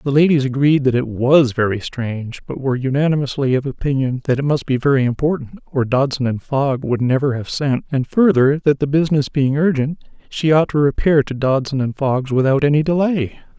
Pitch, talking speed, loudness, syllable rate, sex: 135 Hz, 200 wpm, -17 LUFS, 5.5 syllables/s, male